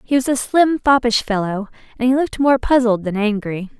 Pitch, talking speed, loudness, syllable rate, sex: 240 Hz, 205 wpm, -17 LUFS, 5.5 syllables/s, female